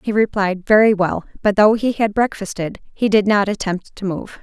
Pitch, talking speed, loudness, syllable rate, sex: 205 Hz, 205 wpm, -18 LUFS, 5.0 syllables/s, female